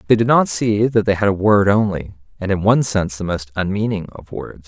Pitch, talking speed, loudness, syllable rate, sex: 100 Hz, 245 wpm, -17 LUFS, 5.8 syllables/s, male